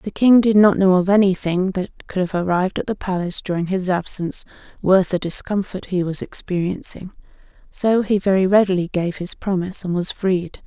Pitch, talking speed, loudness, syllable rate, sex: 185 Hz, 185 wpm, -19 LUFS, 5.4 syllables/s, female